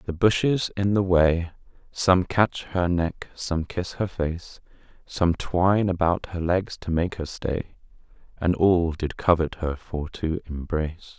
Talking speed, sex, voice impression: 160 wpm, male, masculine, adult-like, tensed, slightly powerful, clear, fluent, cool, calm, reassuring, wild, slightly strict